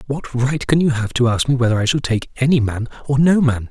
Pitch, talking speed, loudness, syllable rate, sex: 130 Hz, 275 wpm, -17 LUFS, 5.7 syllables/s, male